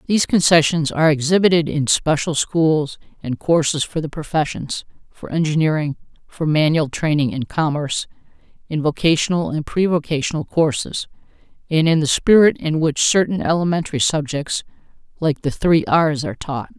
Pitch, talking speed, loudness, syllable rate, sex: 155 Hz, 140 wpm, -18 LUFS, 5.2 syllables/s, female